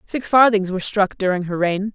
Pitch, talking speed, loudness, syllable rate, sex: 200 Hz, 215 wpm, -18 LUFS, 5.5 syllables/s, female